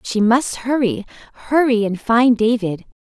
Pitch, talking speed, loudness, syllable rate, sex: 230 Hz, 120 wpm, -17 LUFS, 4.3 syllables/s, female